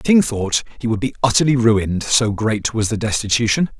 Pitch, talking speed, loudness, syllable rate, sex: 115 Hz, 205 wpm, -18 LUFS, 5.5 syllables/s, male